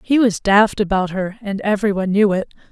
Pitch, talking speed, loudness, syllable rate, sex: 200 Hz, 220 wpm, -17 LUFS, 6.0 syllables/s, female